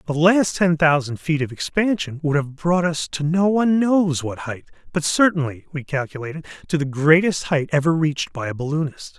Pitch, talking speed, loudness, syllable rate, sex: 155 Hz, 195 wpm, -20 LUFS, 5.2 syllables/s, male